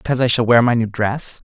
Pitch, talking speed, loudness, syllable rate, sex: 120 Hz, 285 wpm, -16 LUFS, 6.7 syllables/s, male